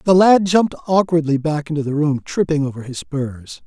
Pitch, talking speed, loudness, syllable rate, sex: 150 Hz, 195 wpm, -18 LUFS, 5.3 syllables/s, male